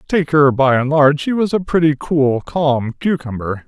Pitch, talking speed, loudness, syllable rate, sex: 145 Hz, 195 wpm, -16 LUFS, 4.6 syllables/s, male